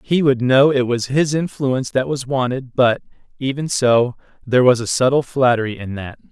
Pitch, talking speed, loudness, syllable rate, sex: 130 Hz, 190 wpm, -18 LUFS, 5.1 syllables/s, male